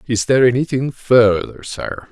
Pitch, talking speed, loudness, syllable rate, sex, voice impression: 120 Hz, 140 wpm, -16 LUFS, 4.6 syllables/s, male, very masculine, slightly young, slightly adult-like, slightly thick, slightly tensed, slightly powerful, bright, very hard, very clear, very fluent, slightly cool, slightly intellectual, slightly refreshing, slightly sincere, calm, mature, friendly, reassuring, slightly unique, wild, slightly sweet, very kind, slightly modest